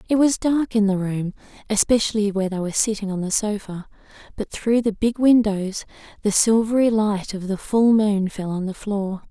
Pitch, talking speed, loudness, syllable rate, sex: 210 Hz, 195 wpm, -21 LUFS, 5.1 syllables/s, female